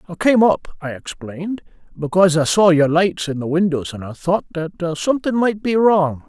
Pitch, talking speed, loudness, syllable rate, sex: 175 Hz, 200 wpm, -18 LUFS, 5.0 syllables/s, male